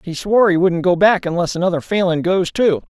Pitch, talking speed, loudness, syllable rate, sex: 180 Hz, 225 wpm, -16 LUFS, 5.8 syllables/s, male